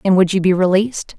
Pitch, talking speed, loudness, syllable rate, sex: 190 Hz, 255 wpm, -15 LUFS, 6.5 syllables/s, female